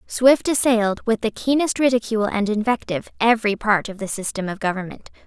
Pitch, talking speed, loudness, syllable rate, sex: 220 Hz, 170 wpm, -20 LUFS, 6.0 syllables/s, female